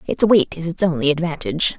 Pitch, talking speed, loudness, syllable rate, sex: 165 Hz, 200 wpm, -18 LUFS, 6.1 syllables/s, female